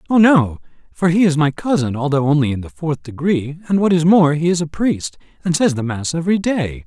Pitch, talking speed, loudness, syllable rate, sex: 155 Hz, 235 wpm, -17 LUFS, 5.5 syllables/s, male